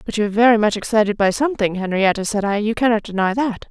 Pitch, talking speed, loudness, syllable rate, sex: 215 Hz, 245 wpm, -18 LUFS, 7.0 syllables/s, female